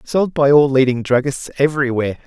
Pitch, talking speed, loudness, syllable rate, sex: 135 Hz, 160 wpm, -16 LUFS, 5.9 syllables/s, male